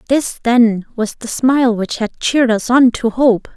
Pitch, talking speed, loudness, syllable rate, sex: 240 Hz, 200 wpm, -15 LUFS, 4.7 syllables/s, female